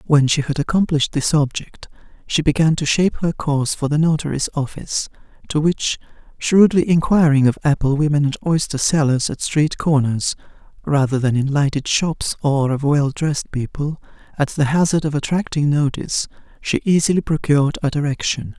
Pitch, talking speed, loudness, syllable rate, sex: 150 Hz, 155 wpm, -18 LUFS, 5.3 syllables/s, male